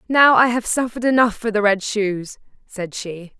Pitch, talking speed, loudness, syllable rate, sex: 220 Hz, 195 wpm, -18 LUFS, 4.8 syllables/s, female